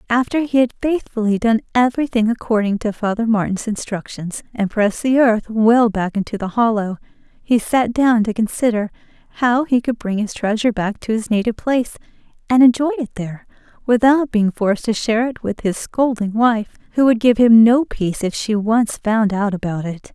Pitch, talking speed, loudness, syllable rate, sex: 225 Hz, 190 wpm, -17 LUFS, 5.3 syllables/s, female